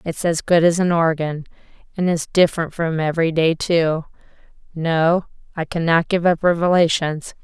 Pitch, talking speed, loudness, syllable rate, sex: 165 Hz, 155 wpm, -19 LUFS, 4.8 syllables/s, female